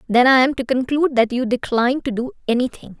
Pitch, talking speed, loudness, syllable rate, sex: 250 Hz, 220 wpm, -18 LUFS, 6.4 syllables/s, female